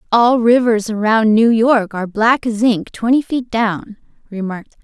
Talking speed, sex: 175 wpm, female